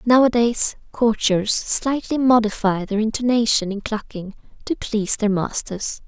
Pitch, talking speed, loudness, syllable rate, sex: 220 Hz, 120 wpm, -20 LUFS, 4.4 syllables/s, female